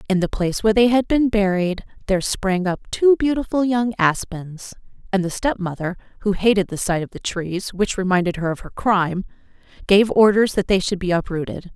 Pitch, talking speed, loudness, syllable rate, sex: 200 Hz, 195 wpm, -20 LUFS, 5.4 syllables/s, female